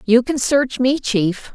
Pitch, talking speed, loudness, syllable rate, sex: 245 Hz, 195 wpm, -18 LUFS, 3.5 syllables/s, female